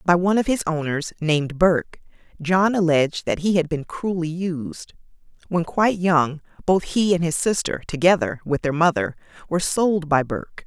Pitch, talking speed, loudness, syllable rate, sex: 170 Hz, 175 wpm, -21 LUFS, 5.1 syllables/s, female